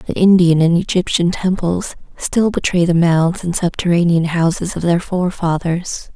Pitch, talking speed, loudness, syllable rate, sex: 175 Hz, 145 wpm, -16 LUFS, 4.6 syllables/s, female